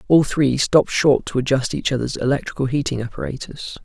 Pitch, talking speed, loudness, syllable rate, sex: 135 Hz, 170 wpm, -20 LUFS, 5.8 syllables/s, male